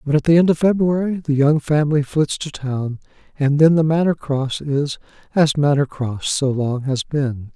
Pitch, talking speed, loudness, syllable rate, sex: 145 Hz, 200 wpm, -18 LUFS, 4.6 syllables/s, male